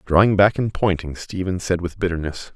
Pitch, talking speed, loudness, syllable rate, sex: 90 Hz, 190 wpm, -21 LUFS, 5.4 syllables/s, male